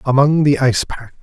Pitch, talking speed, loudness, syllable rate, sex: 135 Hz, 195 wpm, -15 LUFS, 5.7 syllables/s, male